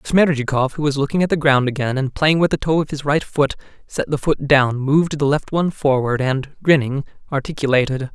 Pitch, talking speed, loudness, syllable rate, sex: 140 Hz, 215 wpm, -18 LUFS, 5.6 syllables/s, male